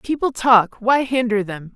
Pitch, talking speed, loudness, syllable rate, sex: 230 Hz, 170 wpm, -17 LUFS, 4.2 syllables/s, female